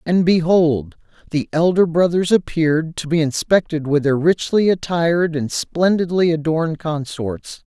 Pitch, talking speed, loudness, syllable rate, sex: 160 Hz, 130 wpm, -18 LUFS, 4.5 syllables/s, male